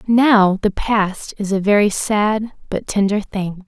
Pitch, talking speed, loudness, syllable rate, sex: 205 Hz, 165 wpm, -17 LUFS, 3.6 syllables/s, female